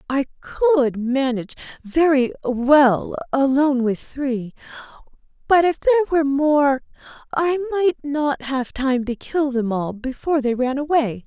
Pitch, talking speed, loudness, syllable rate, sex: 275 Hz, 140 wpm, -20 LUFS, 4.5 syllables/s, female